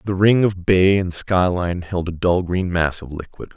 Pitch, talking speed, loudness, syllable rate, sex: 90 Hz, 220 wpm, -19 LUFS, 4.8 syllables/s, male